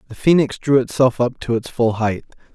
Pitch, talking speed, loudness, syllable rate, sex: 125 Hz, 210 wpm, -18 LUFS, 5.4 syllables/s, male